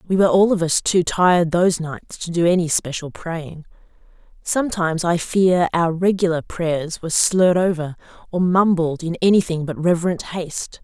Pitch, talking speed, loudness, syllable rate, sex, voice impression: 170 Hz, 165 wpm, -19 LUFS, 5.2 syllables/s, female, feminine, adult-like, slightly relaxed, powerful, clear, raspy, intellectual, friendly, lively, slightly intense, sharp